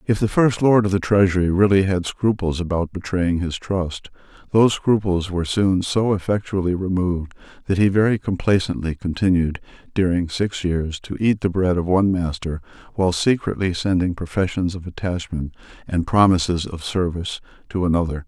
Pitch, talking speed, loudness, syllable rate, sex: 90 Hz, 160 wpm, -20 LUFS, 5.3 syllables/s, male